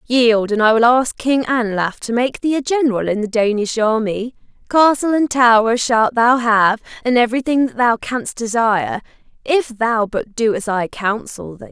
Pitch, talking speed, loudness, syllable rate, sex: 230 Hz, 185 wpm, -16 LUFS, 4.7 syllables/s, female